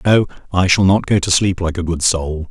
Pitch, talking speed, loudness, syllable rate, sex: 90 Hz, 265 wpm, -16 LUFS, 5.2 syllables/s, male